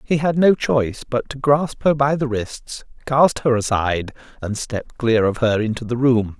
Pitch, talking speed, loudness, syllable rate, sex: 125 Hz, 205 wpm, -19 LUFS, 4.5 syllables/s, male